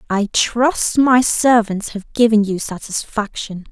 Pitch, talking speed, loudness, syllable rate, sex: 220 Hz, 130 wpm, -17 LUFS, 3.7 syllables/s, female